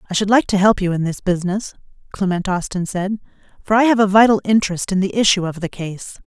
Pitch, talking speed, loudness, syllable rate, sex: 195 Hz, 230 wpm, -17 LUFS, 6.2 syllables/s, female